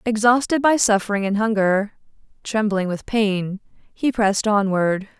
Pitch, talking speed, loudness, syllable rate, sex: 210 Hz, 125 wpm, -20 LUFS, 4.4 syllables/s, female